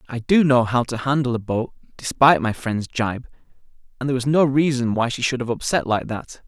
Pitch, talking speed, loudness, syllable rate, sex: 125 Hz, 220 wpm, -20 LUFS, 5.6 syllables/s, male